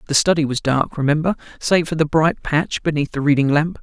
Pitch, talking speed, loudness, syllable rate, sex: 150 Hz, 220 wpm, -18 LUFS, 5.6 syllables/s, male